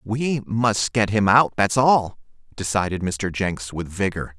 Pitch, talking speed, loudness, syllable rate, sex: 105 Hz, 165 wpm, -21 LUFS, 3.9 syllables/s, male